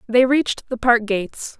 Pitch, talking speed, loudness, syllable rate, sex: 235 Hz, 190 wpm, -19 LUFS, 5.1 syllables/s, female